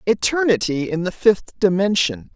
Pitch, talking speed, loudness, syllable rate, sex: 205 Hz, 130 wpm, -19 LUFS, 4.6 syllables/s, female